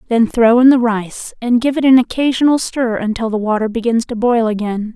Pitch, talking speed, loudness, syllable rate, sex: 235 Hz, 220 wpm, -14 LUFS, 5.3 syllables/s, female